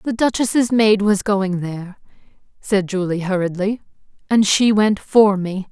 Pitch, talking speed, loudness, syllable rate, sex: 200 Hz, 145 wpm, -17 LUFS, 4.2 syllables/s, female